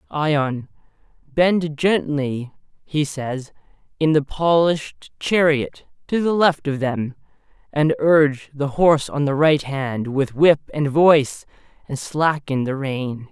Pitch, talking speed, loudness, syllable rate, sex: 145 Hz, 135 wpm, -20 LUFS, 3.6 syllables/s, male